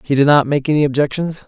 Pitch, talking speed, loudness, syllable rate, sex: 145 Hz, 245 wpm, -15 LUFS, 6.6 syllables/s, male